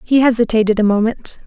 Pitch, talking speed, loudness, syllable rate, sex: 225 Hz, 165 wpm, -15 LUFS, 5.9 syllables/s, female